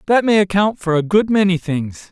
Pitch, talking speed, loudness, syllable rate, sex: 190 Hz, 225 wpm, -16 LUFS, 5.1 syllables/s, male